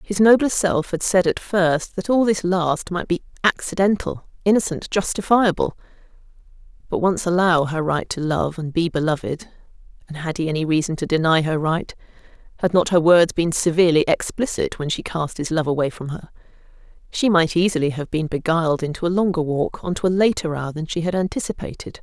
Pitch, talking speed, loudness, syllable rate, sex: 170 Hz, 185 wpm, -20 LUFS, 5.3 syllables/s, female